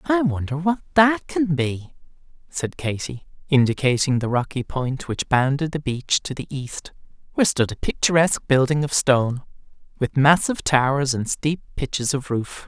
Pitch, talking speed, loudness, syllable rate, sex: 145 Hz, 160 wpm, -21 LUFS, 4.8 syllables/s, male